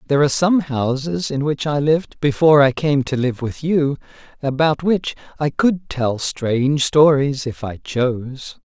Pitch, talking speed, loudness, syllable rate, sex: 145 Hz, 175 wpm, -18 LUFS, 4.6 syllables/s, male